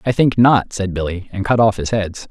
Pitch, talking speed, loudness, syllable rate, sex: 105 Hz, 260 wpm, -17 LUFS, 5.1 syllables/s, male